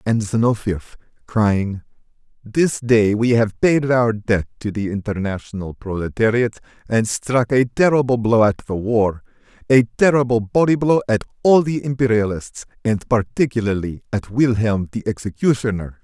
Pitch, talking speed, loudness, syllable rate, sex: 115 Hz, 135 wpm, -19 LUFS, 4.6 syllables/s, male